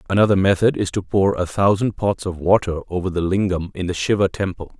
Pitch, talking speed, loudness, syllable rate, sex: 95 Hz, 215 wpm, -19 LUFS, 5.8 syllables/s, male